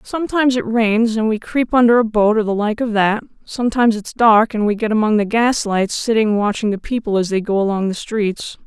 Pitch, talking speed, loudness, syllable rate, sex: 220 Hz, 230 wpm, -17 LUFS, 5.6 syllables/s, female